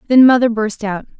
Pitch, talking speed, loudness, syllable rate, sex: 230 Hz, 200 wpm, -14 LUFS, 5.7 syllables/s, female